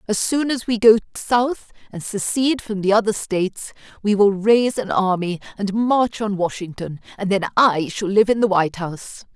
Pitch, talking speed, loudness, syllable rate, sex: 205 Hz, 190 wpm, -19 LUFS, 5.0 syllables/s, female